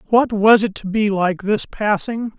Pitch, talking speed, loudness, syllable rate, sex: 210 Hz, 200 wpm, -17 LUFS, 4.2 syllables/s, male